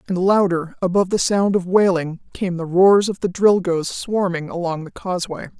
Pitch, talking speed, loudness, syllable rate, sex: 180 Hz, 180 wpm, -19 LUFS, 5.1 syllables/s, female